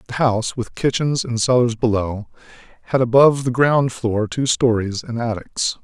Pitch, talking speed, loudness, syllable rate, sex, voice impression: 120 Hz, 165 wpm, -19 LUFS, 4.8 syllables/s, male, very masculine, very middle-aged, very thick, tensed, very powerful, dark, soft, muffled, fluent, raspy, cool, very intellectual, refreshing, sincere, calm, very mature, very friendly, very reassuring, very unique, elegant, slightly wild, sweet, lively, kind, slightly modest